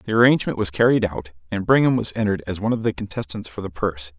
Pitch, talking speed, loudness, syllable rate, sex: 100 Hz, 245 wpm, -21 LUFS, 7.2 syllables/s, male